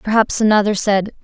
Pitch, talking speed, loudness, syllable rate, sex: 210 Hz, 145 wpm, -15 LUFS, 5.6 syllables/s, female